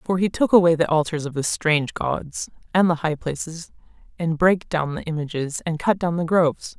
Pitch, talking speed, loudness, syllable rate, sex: 165 Hz, 210 wpm, -22 LUFS, 5.4 syllables/s, female